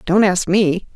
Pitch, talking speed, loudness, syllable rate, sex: 190 Hz, 190 wpm, -16 LUFS, 3.9 syllables/s, female